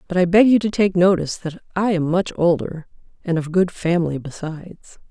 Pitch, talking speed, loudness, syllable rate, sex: 175 Hz, 200 wpm, -19 LUFS, 5.6 syllables/s, female